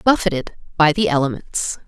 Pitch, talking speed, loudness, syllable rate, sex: 165 Hz, 130 wpm, -19 LUFS, 5.3 syllables/s, female